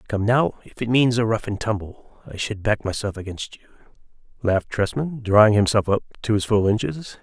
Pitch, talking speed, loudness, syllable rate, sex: 110 Hz, 200 wpm, -21 LUFS, 5.5 syllables/s, male